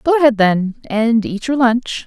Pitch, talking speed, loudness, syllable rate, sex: 235 Hz, 205 wpm, -16 LUFS, 4.2 syllables/s, female